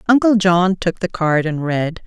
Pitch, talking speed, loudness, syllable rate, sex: 180 Hz, 205 wpm, -17 LUFS, 4.2 syllables/s, female